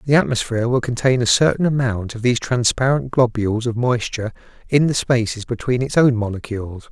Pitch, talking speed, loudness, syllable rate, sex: 120 Hz, 175 wpm, -19 LUFS, 5.9 syllables/s, male